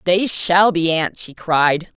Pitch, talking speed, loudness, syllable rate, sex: 175 Hz, 180 wpm, -16 LUFS, 3.3 syllables/s, female